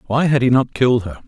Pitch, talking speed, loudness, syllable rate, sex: 125 Hz, 280 wpm, -16 LUFS, 6.7 syllables/s, male